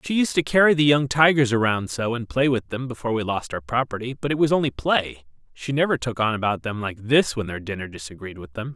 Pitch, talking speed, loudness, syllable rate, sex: 125 Hz, 255 wpm, -22 LUFS, 6.0 syllables/s, male